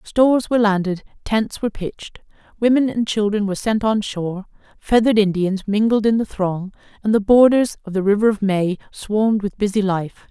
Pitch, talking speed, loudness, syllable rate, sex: 210 Hz, 180 wpm, -19 LUFS, 5.5 syllables/s, female